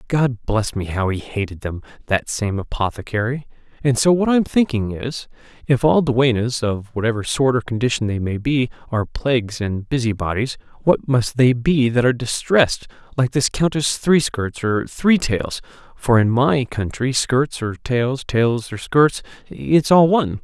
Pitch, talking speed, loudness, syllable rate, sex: 125 Hz, 170 wpm, -19 LUFS, 4.6 syllables/s, male